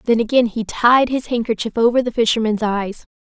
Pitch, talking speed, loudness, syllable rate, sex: 230 Hz, 185 wpm, -17 LUFS, 5.3 syllables/s, female